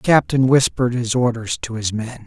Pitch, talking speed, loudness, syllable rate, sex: 120 Hz, 210 wpm, -19 LUFS, 5.4 syllables/s, male